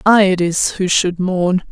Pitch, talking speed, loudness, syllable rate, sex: 185 Hz, 210 wpm, -15 LUFS, 3.8 syllables/s, female